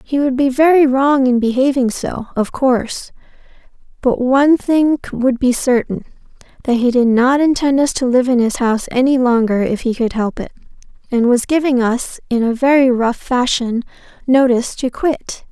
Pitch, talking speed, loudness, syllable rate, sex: 255 Hz, 175 wpm, -15 LUFS, 4.8 syllables/s, female